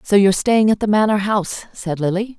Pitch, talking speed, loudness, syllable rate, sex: 205 Hz, 225 wpm, -17 LUFS, 5.5 syllables/s, female